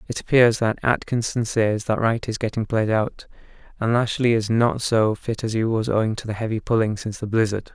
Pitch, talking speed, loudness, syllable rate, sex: 110 Hz, 215 wpm, -22 LUFS, 5.4 syllables/s, male